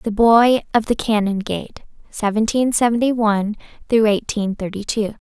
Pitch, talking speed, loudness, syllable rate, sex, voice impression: 220 Hz, 135 wpm, -18 LUFS, 4.9 syllables/s, female, very feminine, very young, very thin, very tensed, powerful, very bright, very soft, very clear, very fluent, very cute, intellectual, very refreshing, sincere, calm, very friendly, very reassuring, very unique, very elegant, very sweet, lively, very kind, modest